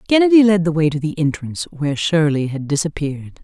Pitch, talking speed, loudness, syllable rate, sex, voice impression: 160 Hz, 190 wpm, -17 LUFS, 6.3 syllables/s, female, feminine, adult-like, fluent, intellectual, slightly calm, slightly elegant